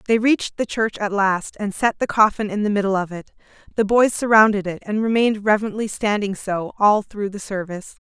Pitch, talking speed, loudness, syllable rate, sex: 205 Hz, 210 wpm, -20 LUFS, 5.6 syllables/s, female